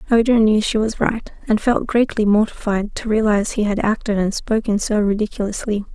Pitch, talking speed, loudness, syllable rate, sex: 215 Hz, 180 wpm, -18 LUFS, 5.5 syllables/s, female